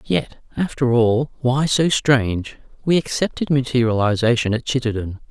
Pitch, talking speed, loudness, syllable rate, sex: 125 Hz, 125 wpm, -19 LUFS, 4.8 syllables/s, male